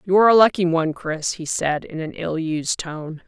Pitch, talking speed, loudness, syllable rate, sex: 170 Hz, 240 wpm, -20 LUFS, 5.1 syllables/s, female